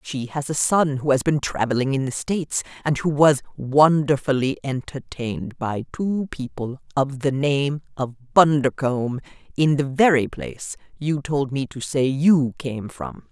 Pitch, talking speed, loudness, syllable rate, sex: 140 Hz, 160 wpm, -22 LUFS, 4.3 syllables/s, female